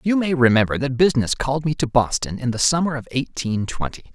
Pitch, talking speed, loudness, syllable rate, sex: 135 Hz, 215 wpm, -20 LUFS, 6.0 syllables/s, male